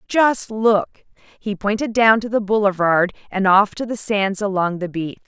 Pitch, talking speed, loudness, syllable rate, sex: 205 Hz, 180 wpm, -18 LUFS, 4.2 syllables/s, female